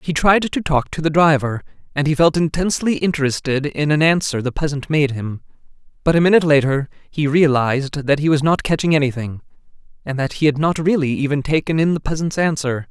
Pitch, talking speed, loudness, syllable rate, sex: 150 Hz, 200 wpm, -18 LUFS, 5.8 syllables/s, male